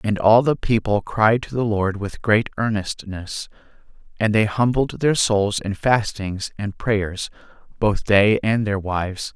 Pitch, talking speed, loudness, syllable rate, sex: 105 Hz, 160 wpm, -20 LUFS, 3.9 syllables/s, male